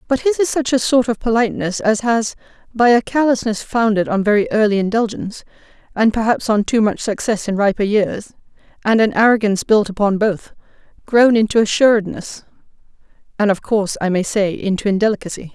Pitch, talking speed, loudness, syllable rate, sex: 215 Hz, 170 wpm, -16 LUFS, 5.9 syllables/s, female